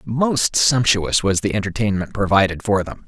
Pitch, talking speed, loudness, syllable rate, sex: 105 Hz, 155 wpm, -18 LUFS, 4.7 syllables/s, male